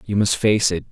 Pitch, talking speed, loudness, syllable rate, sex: 100 Hz, 265 wpm, -18 LUFS, 5.1 syllables/s, male